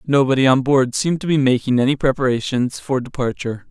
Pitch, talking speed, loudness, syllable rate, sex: 130 Hz, 180 wpm, -18 LUFS, 6.2 syllables/s, male